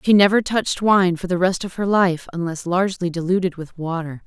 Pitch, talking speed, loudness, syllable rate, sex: 180 Hz, 210 wpm, -20 LUFS, 5.6 syllables/s, female